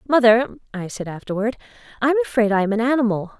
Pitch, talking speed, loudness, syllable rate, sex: 225 Hz, 195 wpm, -20 LUFS, 6.8 syllables/s, female